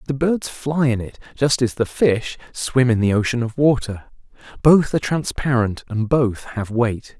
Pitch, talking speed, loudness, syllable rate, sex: 125 Hz, 185 wpm, -19 LUFS, 4.4 syllables/s, male